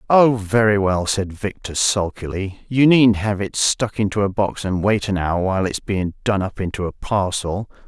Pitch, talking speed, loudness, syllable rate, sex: 100 Hz, 200 wpm, -19 LUFS, 4.6 syllables/s, male